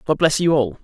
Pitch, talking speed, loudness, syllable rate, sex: 150 Hz, 290 wpm, -18 LUFS, 5.7 syllables/s, male